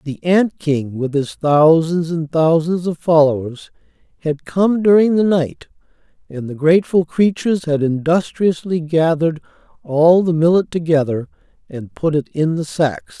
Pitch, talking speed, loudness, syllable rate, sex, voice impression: 160 Hz, 145 wpm, -16 LUFS, 4.4 syllables/s, male, masculine, middle-aged, slightly thick, slightly calm, slightly friendly